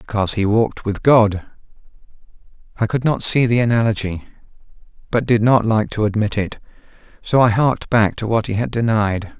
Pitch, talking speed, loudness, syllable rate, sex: 110 Hz, 170 wpm, -18 LUFS, 5.6 syllables/s, male